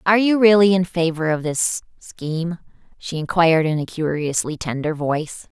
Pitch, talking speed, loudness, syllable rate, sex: 165 Hz, 150 wpm, -19 LUFS, 5.2 syllables/s, female